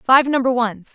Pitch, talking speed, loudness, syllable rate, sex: 250 Hz, 190 wpm, -17 LUFS, 4.4 syllables/s, female